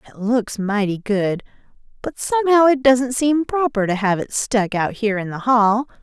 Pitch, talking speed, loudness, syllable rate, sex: 230 Hz, 190 wpm, -18 LUFS, 4.7 syllables/s, female